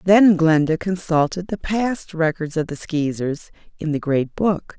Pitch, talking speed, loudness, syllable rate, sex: 170 Hz, 165 wpm, -20 LUFS, 4.1 syllables/s, female